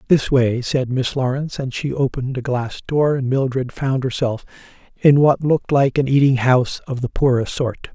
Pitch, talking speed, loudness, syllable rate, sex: 130 Hz, 195 wpm, -19 LUFS, 5.0 syllables/s, male